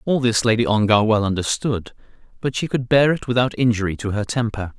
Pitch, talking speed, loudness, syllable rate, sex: 115 Hz, 200 wpm, -19 LUFS, 5.7 syllables/s, male